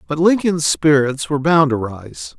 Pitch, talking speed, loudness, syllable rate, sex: 150 Hz, 175 wpm, -16 LUFS, 4.5 syllables/s, male